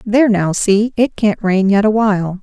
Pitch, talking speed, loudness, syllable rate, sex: 210 Hz, 200 wpm, -14 LUFS, 4.8 syllables/s, female